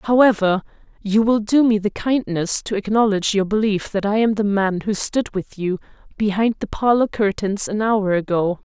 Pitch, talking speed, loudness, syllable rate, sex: 210 Hz, 185 wpm, -19 LUFS, 4.9 syllables/s, female